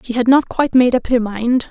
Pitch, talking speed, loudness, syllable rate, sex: 240 Hz, 280 wpm, -15 LUFS, 5.6 syllables/s, female